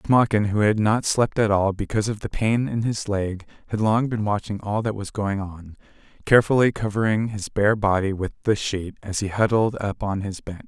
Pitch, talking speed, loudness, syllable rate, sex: 105 Hz, 215 wpm, -22 LUFS, 5.2 syllables/s, male